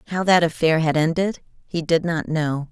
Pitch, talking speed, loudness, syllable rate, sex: 165 Hz, 200 wpm, -20 LUFS, 4.9 syllables/s, female